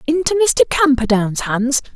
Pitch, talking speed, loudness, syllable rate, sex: 270 Hz, 125 wpm, -16 LUFS, 4.4 syllables/s, female